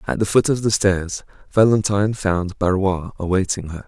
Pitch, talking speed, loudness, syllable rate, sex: 95 Hz, 170 wpm, -19 LUFS, 5.0 syllables/s, male